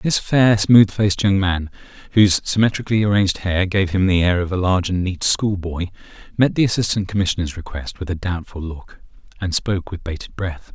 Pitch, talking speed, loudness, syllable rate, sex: 95 Hz, 190 wpm, -19 LUFS, 5.6 syllables/s, male